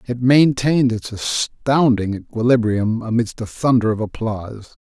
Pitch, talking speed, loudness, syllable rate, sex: 115 Hz, 125 wpm, -18 LUFS, 4.6 syllables/s, male